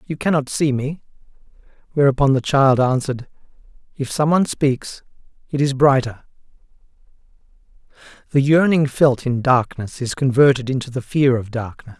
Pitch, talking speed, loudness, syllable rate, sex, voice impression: 135 Hz, 130 wpm, -18 LUFS, 5.2 syllables/s, male, masculine, adult-like, slightly fluent, slightly refreshing, sincere, slightly friendly, reassuring